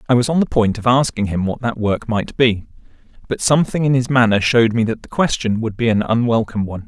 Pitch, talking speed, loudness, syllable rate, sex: 115 Hz, 245 wpm, -17 LUFS, 6.3 syllables/s, male